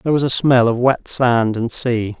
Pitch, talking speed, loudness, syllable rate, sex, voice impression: 120 Hz, 245 wpm, -16 LUFS, 4.7 syllables/s, male, very masculine, very middle-aged, very thick, relaxed, weak, dark, soft, muffled, slightly halting, slightly cool, intellectual, slightly refreshing, sincere, very calm, mature, slightly friendly, slightly reassuring, very unique, slightly elegant, wild, slightly lively, kind, modest, slightly light